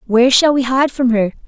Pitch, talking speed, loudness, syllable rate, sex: 250 Hz, 245 wpm, -14 LUFS, 5.9 syllables/s, female